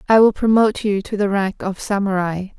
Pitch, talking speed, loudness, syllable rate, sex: 200 Hz, 210 wpm, -18 LUFS, 5.5 syllables/s, female